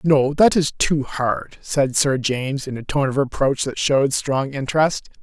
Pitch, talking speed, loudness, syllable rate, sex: 140 Hz, 195 wpm, -20 LUFS, 4.4 syllables/s, male